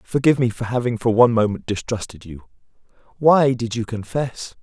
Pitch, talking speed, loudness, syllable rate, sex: 115 Hz, 170 wpm, -20 LUFS, 5.5 syllables/s, male